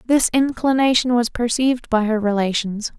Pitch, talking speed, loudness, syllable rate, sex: 235 Hz, 140 wpm, -19 LUFS, 4.9 syllables/s, female